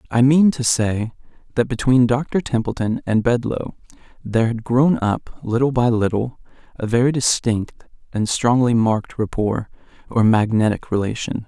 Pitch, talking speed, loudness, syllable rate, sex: 120 Hz, 140 wpm, -19 LUFS, 4.8 syllables/s, male